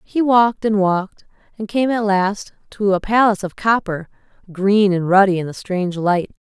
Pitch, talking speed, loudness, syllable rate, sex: 200 Hz, 185 wpm, -17 LUFS, 5.1 syllables/s, female